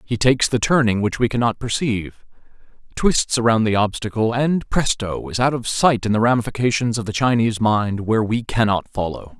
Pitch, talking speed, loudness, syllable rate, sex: 115 Hz, 185 wpm, -19 LUFS, 5.5 syllables/s, male